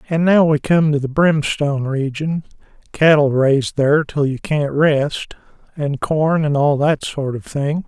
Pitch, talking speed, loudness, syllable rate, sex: 145 Hz, 160 wpm, -17 LUFS, 4.3 syllables/s, male